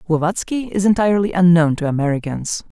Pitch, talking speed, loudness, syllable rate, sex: 175 Hz, 130 wpm, -17 LUFS, 6.0 syllables/s, male